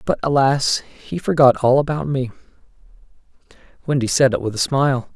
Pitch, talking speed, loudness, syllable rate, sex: 135 Hz, 150 wpm, -18 LUFS, 5.3 syllables/s, male